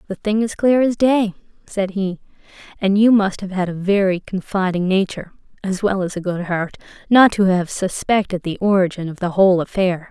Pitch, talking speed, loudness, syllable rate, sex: 190 Hz, 195 wpm, -18 LUFS, 5.3 syllables/s, female